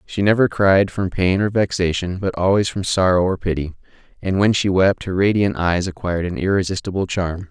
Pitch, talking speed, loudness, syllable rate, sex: 95 Hz, 190 wpm, -19 LUFS, 5.4 syllables/s, male